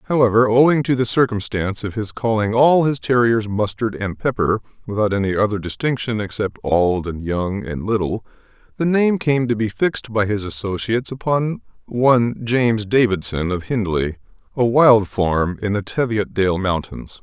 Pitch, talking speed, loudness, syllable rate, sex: 110 Hz, 160 wpm, -19 LUFS, 5.0 syllables/s, male